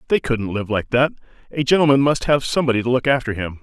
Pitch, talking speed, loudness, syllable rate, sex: 130 Hz, 230 wpm, -19 LUFS, 6.6 syllables/s, male